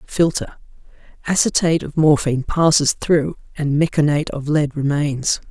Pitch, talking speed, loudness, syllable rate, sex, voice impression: 150 Hz, 120 wpm, -18 LUFS, 5.0 syllables/s, female, feminine, adult-like, relaxed, slightly weak, soft, fluent, intellectual, calm, reassuring, elegant, kind, modest